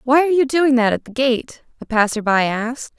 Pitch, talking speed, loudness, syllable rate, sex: 250 Hz, 240 wpm, -18 LUFS, 5.6 syllables/s, female